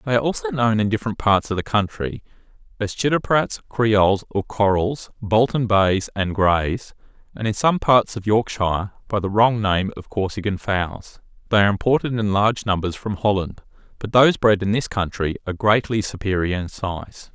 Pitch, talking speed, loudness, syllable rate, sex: 105 Hz, 175 wpm, -20 LUFS, 5.1 syllables/s, male